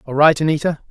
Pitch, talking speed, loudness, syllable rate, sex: 150 Hz, 200 wpm, -16 LUFS, 6.6 syllables/s, male